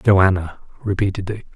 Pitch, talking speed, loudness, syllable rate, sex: 95 Hz, 115 wpm, -20 LUFS, 4.9 syllables/s, male